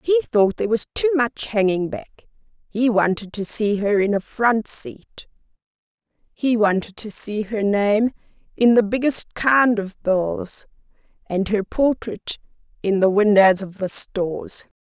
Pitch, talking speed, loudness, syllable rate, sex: 215 Hz, 155 wpm, -20 LUFS, 4.0 syllables/s, female